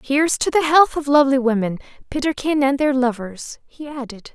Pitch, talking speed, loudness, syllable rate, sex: 270 Hz, 165 wpm, -18 LUFS, 6.0 syllables/s, female